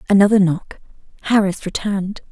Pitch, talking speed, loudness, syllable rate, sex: 195 Hz, 105 wpm, -17 LUFS, 5.7 syllables/s, female